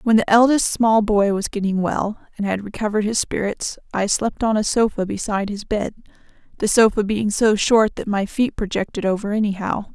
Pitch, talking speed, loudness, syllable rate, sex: 210 Hz, 185 wpm, -20 LUFS, 5.3 syllables/s, female